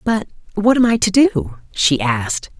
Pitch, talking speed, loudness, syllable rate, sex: 190 Hz, 185 wpm, -16 LUFS, 4.4 syllables/s, female